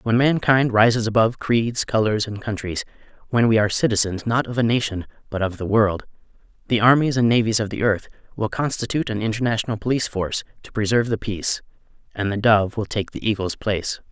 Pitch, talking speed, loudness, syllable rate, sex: 110 Hz, 190 wpm, -21 LUFS, 6.2 syllables/s, male